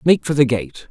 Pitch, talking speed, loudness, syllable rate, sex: 130 Hz, 265 wpm, -17 LUFS, 4.9 syllables/s, male